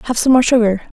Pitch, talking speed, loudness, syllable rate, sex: 235 Hz, 245 wpm, -13 LUFS, 6.7 syllables/s, female